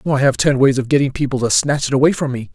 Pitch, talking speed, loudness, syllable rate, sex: 130 Hz, 305 wpm, -16 LUFS, 6.7 syllables/s, male